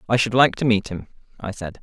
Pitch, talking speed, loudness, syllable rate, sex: 110 Hz, 265 wpm, -20 LUFS, 6.0 syllables/s, male